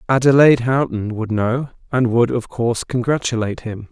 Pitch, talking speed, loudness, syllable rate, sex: 120 Hz, 155 wpm, -18 LUFS, 5.4 syllables/s, male